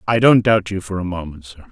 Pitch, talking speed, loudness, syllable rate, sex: 95 Hz, 280 wpm, -17 LUFS, 5.8 syllables/s, male